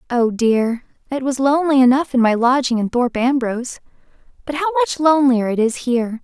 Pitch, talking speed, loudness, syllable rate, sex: 255 Hz, 185 wpm, -17 LUFS, 6.1 syllables/s, female